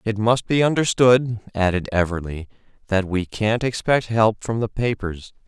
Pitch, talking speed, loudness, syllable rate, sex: 110 Hz, 155 wpm, -20 LUFS, 4.5 syllables/s, male